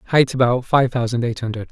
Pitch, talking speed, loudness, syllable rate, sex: 125 Hz, 210 wpm, -19 LUFS, 5.4 syllables/s, male